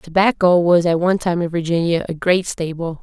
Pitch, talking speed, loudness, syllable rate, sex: 170 Hz, 200 wpm, -17 LUFS, 5.4 syllables/s, female